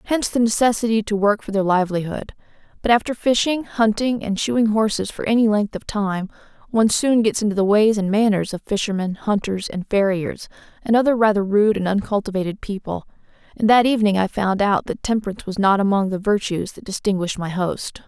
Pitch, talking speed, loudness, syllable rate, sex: 210 Hz, 190 wpm, -20 LUFS, 5.8 syllables/s, female